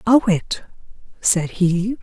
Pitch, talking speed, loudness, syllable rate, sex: 200 Hz, 120 wpm, -19 LUFS, 3.0 syllables/s, female